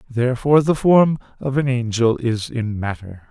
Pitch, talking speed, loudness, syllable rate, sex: 125 Hz, 165 wpm, -19 LUFS, 4.8 syllables/s, male